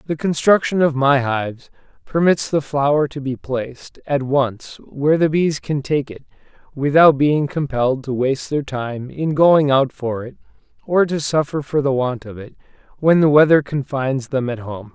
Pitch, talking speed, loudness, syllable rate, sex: 140 Hz, 185 wpm, -18 LUFS, 4.6 syllables/s, male